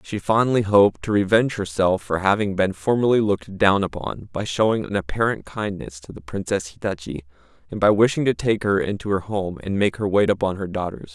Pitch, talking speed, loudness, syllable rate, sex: 100 Hz, 205 wpm, -21 LUFS, 5.6 syllables/s, male